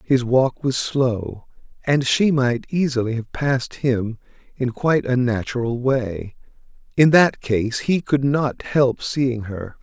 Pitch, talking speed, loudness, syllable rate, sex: 125 Hz, 155 wpm, -20 LUFS, 3.7 syllables/s, male